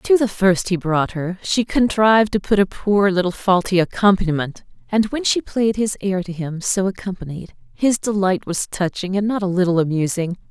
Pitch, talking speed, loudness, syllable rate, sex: 195 Hz, 195 wpm, -19 LUFS, 5.1 syllables/s, female